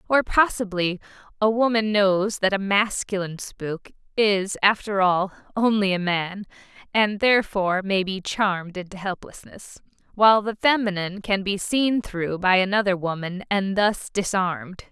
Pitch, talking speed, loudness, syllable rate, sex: 195 Hz, 140 wpm, -22 LUFS, 4.6 syllables/s, female